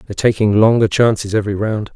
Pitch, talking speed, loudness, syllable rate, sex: 105 Hz, 185 wpm, -15 LUFS, 6.8 syllables/s, male